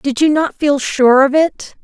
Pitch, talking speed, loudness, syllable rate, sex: 285 Hz, 230 wpm, -13 LUFS, 4.0 syllables/s, female